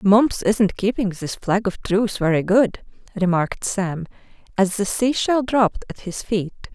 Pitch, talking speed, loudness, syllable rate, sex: 200 Hz, 160 wpm, -21 LUFS, 4.4 syllables/s, female